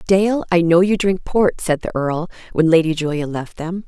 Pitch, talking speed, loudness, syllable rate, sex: 175 Hz, 215 wpm, -18 LUFS, 4.7 syllables/s, female